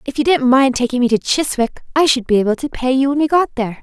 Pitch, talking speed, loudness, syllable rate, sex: 260 Hz, 300 wpm, -16 LUFS, 6.4 syllables/s, female